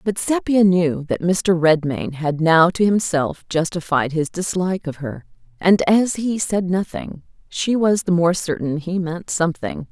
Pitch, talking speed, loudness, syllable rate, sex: 175 Hz, 170 wpm, -19 LUFS, 4.3 syllables/s, female